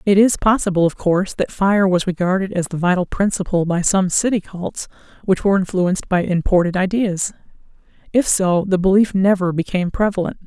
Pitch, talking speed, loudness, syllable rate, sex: 190 Hz, 170 wpm, -18 LUFS, 5.6 syllables/s, female